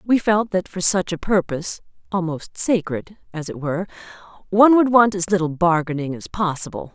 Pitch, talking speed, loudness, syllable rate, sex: 185 Hz, 175 wpm, -20 LUFS, 5.4 syllables/s, female